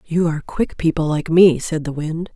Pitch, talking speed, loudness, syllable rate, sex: 160 Hz, 230 wpm, -18 LUFS, 5.0 syllables/s, female